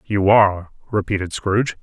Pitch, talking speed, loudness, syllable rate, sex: 100 Hz, 130 wpm, -18 LUFS, 5.5 syllables/s, male